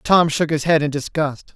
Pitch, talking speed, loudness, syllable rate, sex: 155 Hz, 230 wpm, -19 LUFS, 4.6 syllables/s, male